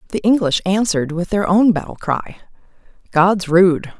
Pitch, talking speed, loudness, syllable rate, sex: 185 Hz, 150 wpm, -16 LUFS, 4.8 syllables/s, female